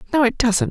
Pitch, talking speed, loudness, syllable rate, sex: 255 Hz, 255 wpm, -18 LUFS, 6.0 syllables/s, female